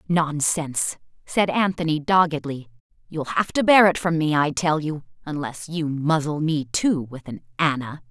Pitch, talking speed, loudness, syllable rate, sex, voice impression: 155 Hz, 155 wpm, -22 LUFS, 4.6 syllables/s, female, feminine, middle-aged, tensed, powerful, clear, fluent, intellectual, calm, elegant, lively, intense, sharp